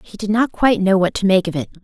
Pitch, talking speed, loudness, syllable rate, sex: 195 Hz, 330 wpm, -17 LUFS, 6.8 syllables/s, female